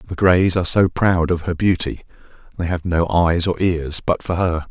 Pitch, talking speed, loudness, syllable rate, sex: 85 Hz, 215 wpm, -18 LUFS, 4.9 syllables/s, male